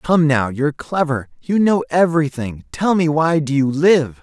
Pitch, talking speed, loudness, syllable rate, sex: 150 Hz, 170 wpm, -17 LUFS, 4.6 syllables/s, male